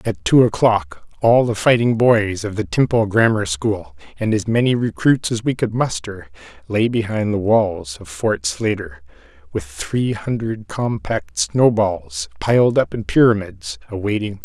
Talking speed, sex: 175 wpm, male